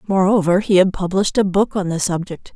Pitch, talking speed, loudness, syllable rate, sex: 185 Hz, 210 wpm, -17 LUFS, 5.9 syllables/s, female